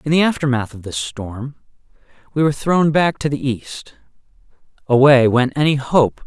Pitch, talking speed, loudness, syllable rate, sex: 135 Hz, 170 wpm, -17 LUFS, 5.1 syllables/s, male